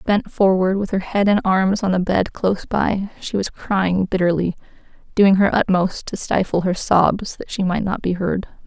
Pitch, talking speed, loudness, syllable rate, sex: 190 Hz, 200 wpm, -19 LUFS, 4.6 syllables/s, female